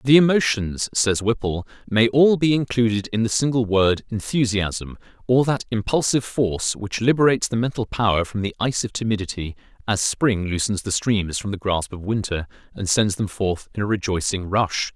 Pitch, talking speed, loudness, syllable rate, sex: 110 Hz, 180 wpm, -21 LUFS, 5.2 syllables/s, male